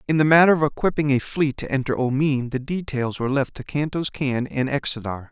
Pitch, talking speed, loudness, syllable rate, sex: 140 Hz, 215 wpm, -22 LUFS, 5.5 syllables/s, male